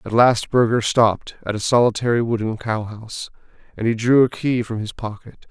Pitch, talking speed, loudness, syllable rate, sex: 115 Hz, 195 wpm, -19 LUFS, 5.4 syllables/s, male